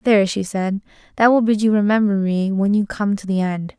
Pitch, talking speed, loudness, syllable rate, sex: 200 Hz, 240 wpm, -18 LUFS, 5.4 syllables/s, female